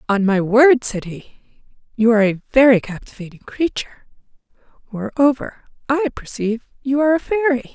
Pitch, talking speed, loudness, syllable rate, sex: 245 Hz, 140 wpm, -17 LUFS, 5.4 syllables/s, female